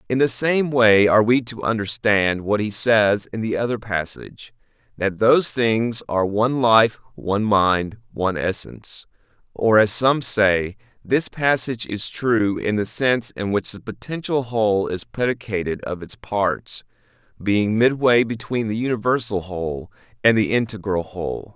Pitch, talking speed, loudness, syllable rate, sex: 110 Hz, 155 wpm, -20 LUFS, 4.6 syllables/s, male